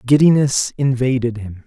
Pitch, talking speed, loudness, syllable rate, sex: 125 Hz, 110 wpm, -16 LUFS, 4.7 syllables/s, male